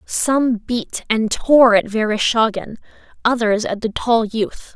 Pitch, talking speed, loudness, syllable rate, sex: 225 Hz, 140 wpm, -17 LUFS, 3.7 syllables/s, female